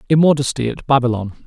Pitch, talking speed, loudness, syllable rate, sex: 130 Hz, 125 wpm, -17 LUFS, 6.8 syllables/s, male